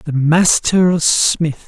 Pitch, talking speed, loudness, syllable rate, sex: 160 Hz, 105 wpm, -13 LUFS, 2.5 syllables/s, male